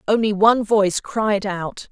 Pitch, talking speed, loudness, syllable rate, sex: 210 Hz, 155 wpm, -19 LUFS, 4.6 syllables/s, female